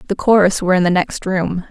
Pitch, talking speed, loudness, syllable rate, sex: 185 Hz, 245 wpm, -15 LUFS, 6.0 syllables/s, female